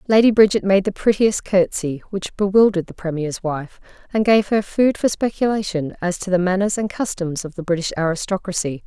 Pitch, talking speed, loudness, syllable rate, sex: 190 Hz, 185 wpm, -19 LUFS, 5.5 syllables/s, female